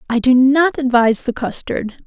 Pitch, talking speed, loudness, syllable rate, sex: 255 Hz, 175 wpm, -15 LUFS, 5.0 syllables/s, female